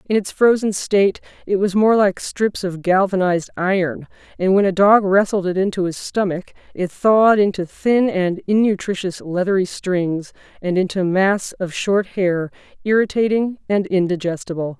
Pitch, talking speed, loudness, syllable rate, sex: 190 Hz, 160 wpm, -18 LUFS, 4.9 syllables/s, female